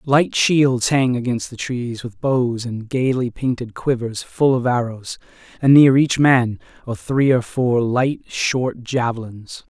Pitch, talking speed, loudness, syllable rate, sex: 125 Hz, 160 wpm, -18 LUFS, 3.8 syllables/s, male